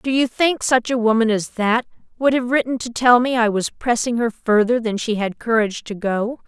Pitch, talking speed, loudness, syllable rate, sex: 235 Hz, 230 wpm, -19 LUFS, 5.1 syllables/s, female